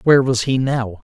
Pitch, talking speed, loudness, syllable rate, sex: 125 Hz, 215 wpm, -18 LUFS, 5.4 syllables/s, male